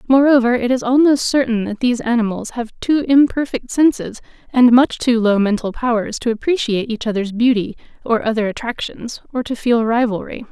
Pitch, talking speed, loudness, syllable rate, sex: 240 Hz, 170 wpm, -17 LUFS, 5.5 syllables/s, female